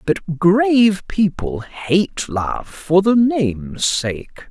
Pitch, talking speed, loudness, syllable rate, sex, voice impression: 175 Hz, 120 wpm, -17 LUFS, 2.8 syllables/s, male, masculine, adult-like, tensed, powerful, slightly bright, clear, cool, intellectual, calm, mature, slightly friendly, wild, lively, slightly intense